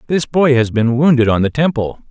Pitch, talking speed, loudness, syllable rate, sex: 130 Hz, 230 wpm, -14 LUFS, 5.5 syllables/s, male